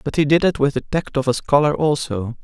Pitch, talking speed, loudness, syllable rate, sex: 140 Hz, 270 wpm, -19 LUFS, 5.7 syllables/s, male